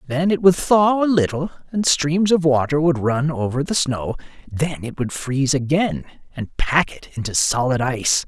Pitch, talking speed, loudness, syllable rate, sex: 150 Hz, 190 wpm, -19 LUFS, 4.7 syllables/s, male